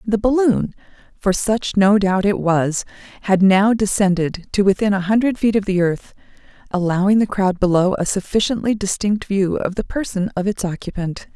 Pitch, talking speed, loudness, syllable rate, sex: 200 Hz, 175 wpm, -18 LUFS, 4.7 syllables/s, female